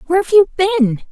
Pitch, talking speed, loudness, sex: 340 Hz, 160 wpm, -14 LUFS, female